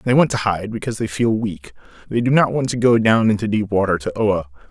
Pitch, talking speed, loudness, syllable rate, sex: 110 Hz, 255 wpm, -18 LUFS, 6.0 syllables/s, male